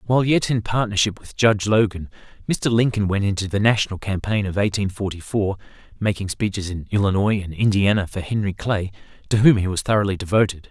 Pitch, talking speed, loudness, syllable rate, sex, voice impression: 100 Hz, 185 wpm, -21 LUFS, 6.0 syllables/s, male, masculine, adult-like, tensed, bright, clear, fluent, cool, intellectual, refreshing, sincere, slightly mature, friendly, reassuring, lively, kind